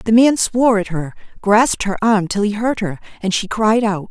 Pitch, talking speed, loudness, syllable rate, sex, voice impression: 210 Hz, 235 wpm, -17 LUFS, 5.2 syllables/s, female, feminine, middle-aged, tensed, powerful, bright, clear, intellectual, friendly, elegant, lively, slightly strict